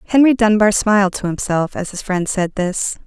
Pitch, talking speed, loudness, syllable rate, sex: 200 Hz, 195 wpm, -17 LUFS, 5.1 syllables/s, female